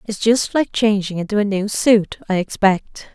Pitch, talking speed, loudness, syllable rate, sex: 205 Hz, 190 wpm, -18 LUFS, 4.4 syllables/s, female